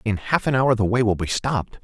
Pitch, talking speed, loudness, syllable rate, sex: 110 Hz, 295 wpm, -21 LUFS, 5.8 syllables/s, male